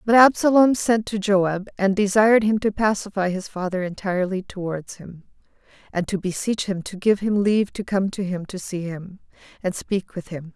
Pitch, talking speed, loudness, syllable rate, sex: 195 Hz, 195 wpm, -22 LUFS, 5.1 syllables/s, female